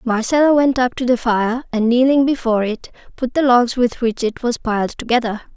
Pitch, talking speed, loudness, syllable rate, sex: 240 Hz, 205 wpm, -17 LUFS, 5.3 syllables/s, female